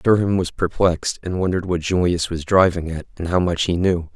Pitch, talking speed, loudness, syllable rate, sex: 90 Hz, 215 wpm, -20 LUFS, 5.5 syllables/s, male